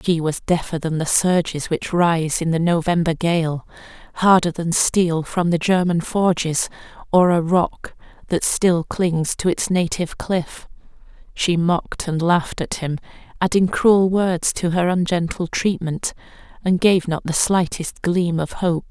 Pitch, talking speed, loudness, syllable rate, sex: 170 Hz, 160 wpm, -19 LUFS, 4.2 syllables/s, female